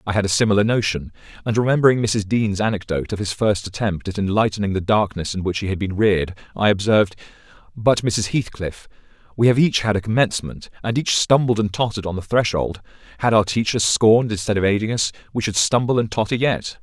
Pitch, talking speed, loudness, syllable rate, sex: 105 Hz, 200 wpm, -20 LUFS, 6.1 syllables/s, male